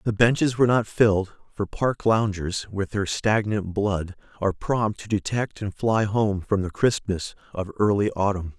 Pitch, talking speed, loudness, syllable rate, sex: 105 Hz, 175 wpm, -24 LUFS, 4.5 syllables/s, male